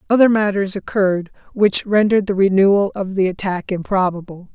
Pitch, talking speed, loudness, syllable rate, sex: 195 Hz, 145 wpm, -17 LUFS, 5.6 syllables/s, female